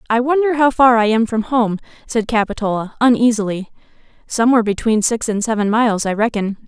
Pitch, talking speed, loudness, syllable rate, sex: 225 Hz, 170 wpm, -16 LUFS, 6.0 syllables/s, female